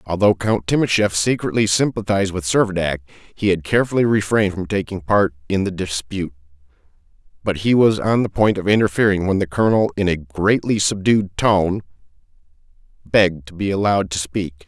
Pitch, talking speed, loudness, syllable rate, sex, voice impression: 95 Hz, 160 wpm, -18 LUFS, 5.7 syllables/s, male, very masculine, very thick, very tensed, very powerful, bright, hard, very clear, very fluent, very cool, intellectual, refreshing, slightly sincere, calm, very friendly, reassuring, very unique, elegant, very wild, sweet, lively, kind, slightly intense